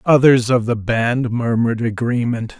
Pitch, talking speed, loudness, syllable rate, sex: 120 Hz, 140 wpm, -17 LUFS, 4.4 syllables/s, male